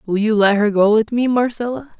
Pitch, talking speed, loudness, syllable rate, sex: 220 Hz, 240 wpm, -16 LUFS, 5.5 syllables/s, female